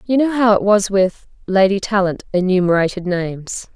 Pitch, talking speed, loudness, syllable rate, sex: 195 Hz, 160 wpm, -17 LUFS, 4.9 syllables/s, female